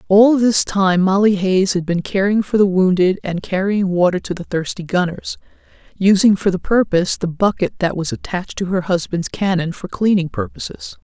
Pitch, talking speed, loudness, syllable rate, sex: 190 Hz, 185 wpm, -17 LUFS, 5.1 syllables/s, female